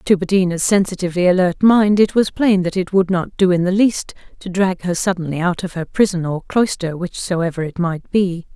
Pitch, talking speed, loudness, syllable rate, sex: 185 Hz, 210 wpm, -17 LUFS, 5.3 syllables/s, female